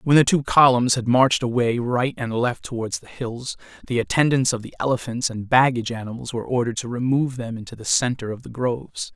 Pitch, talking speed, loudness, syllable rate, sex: 125 Hz, 210 wpm, -22 LUFS, 6.0 syllables/s, male